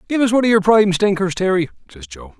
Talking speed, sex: 250 wpm, male